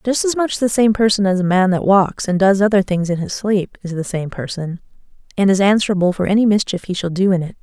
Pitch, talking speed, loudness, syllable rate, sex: 195 Hz, 260 wpm, -17 LUFS, 5.9 syllables/s, female